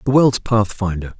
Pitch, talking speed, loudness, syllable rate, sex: 110 Hz, 150 wpm, -18 LUFS, 4.8 syllables/s, male